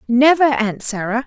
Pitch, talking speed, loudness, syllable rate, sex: 250 Hz, 145 wpm, -16 LUFS, 4.6 syllables/s, female